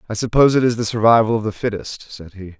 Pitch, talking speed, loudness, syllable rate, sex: 110 Hz, 255 wpm, -17 LUFS, 6.8 syllables/s, male